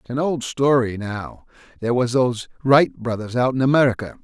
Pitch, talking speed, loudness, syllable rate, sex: 125 Hz, 170 wpm, -20 LUFS, 5.7 syllables/s, male